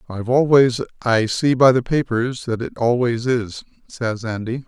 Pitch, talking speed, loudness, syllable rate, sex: 120 Hz, 155 wpm, -19 LUFS, 4.5 syllables/s, male